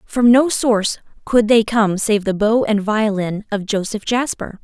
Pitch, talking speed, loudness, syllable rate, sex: 215 Hz, 180 wpm, -17 LUFS, 4.3 syllables/s, female